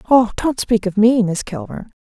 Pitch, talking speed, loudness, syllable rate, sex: 220 Hz, 210 wpm, -17 LUFS, 4.9 syllables/s, female